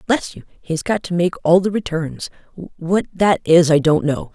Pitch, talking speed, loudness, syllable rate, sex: 170 Hz, 220 wpm, -17 LUFS, 4.6 syllables/s, female